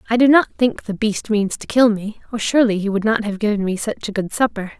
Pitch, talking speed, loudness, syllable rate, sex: 215 Hz, 275 wpm, -18 LUFS, 6.0 syllables/s, female